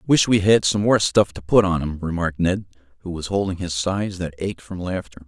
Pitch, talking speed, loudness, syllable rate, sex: 90 Hz, 240 wpm, -21 LUFS, 5.5 syllables/s, male